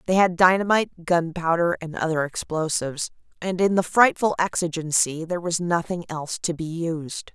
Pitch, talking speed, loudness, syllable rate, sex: 170 Hz, 155 wpm, -23 LUFS, 5.2 syllables/s, female